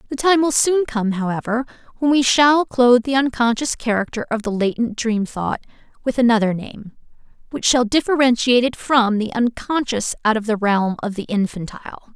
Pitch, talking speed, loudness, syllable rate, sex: 235 Hz, 175 wpm, -18 LUFS, 5.4 syllables/s, female